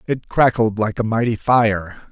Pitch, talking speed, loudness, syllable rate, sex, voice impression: 110 Hz, 170 wpm, -18 LUFS, 4.4 syllables/s, male, very masculine, adult-like, thick, cool, wild